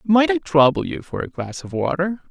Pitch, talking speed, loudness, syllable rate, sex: 155 Hz, 235 wpm, -20 LUFS, 5.2 syllables/s, male